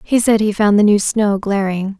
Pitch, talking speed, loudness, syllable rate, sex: 205 Hz, 240 wpm, -15 LUFS, 4.8 syllables/s, female